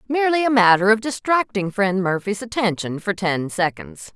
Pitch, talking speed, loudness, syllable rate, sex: 205 Hz, 160 wpm, -19 LUFS, 5.1 syllables/s, female